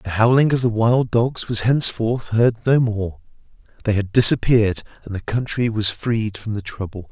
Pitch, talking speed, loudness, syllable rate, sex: 110 Hz, 185 wpm, -19 LUFS, 4.8 syllables/s, male